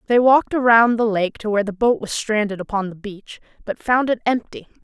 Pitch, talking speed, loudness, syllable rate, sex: 220 Hz, 225 wpm, -18 LUFS, 5.7 syllables/s, female